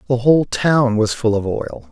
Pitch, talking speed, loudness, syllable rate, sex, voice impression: 120 Hz, 220 wpm, -17 LUFS, 4.7 syllables/s, male, very masculine, very middle-aged, very thick, tensed, powerful, bright, soft, clear, fluent, slightly raspy, cool, very intellectual, refreshing, sincere, very calm, mature, very friendly, reassuring, very unique, elegant, very wild, sweet, lively, slightly kind, slightly intense